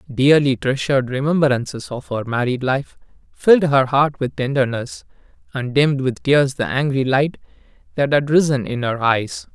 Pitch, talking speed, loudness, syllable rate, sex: 135 Hz, 155 wpm, -18 LUFS, 4.8 syllables/s, male